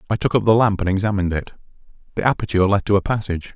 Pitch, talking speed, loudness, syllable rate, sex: 100 Hz, 235 wpm, -19 LUFS, 8.0 syllables/s, male